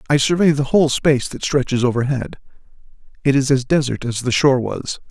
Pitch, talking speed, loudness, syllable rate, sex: 135 Hz, 190 wpm, -18 LUFS, 6.1 syllables/s, male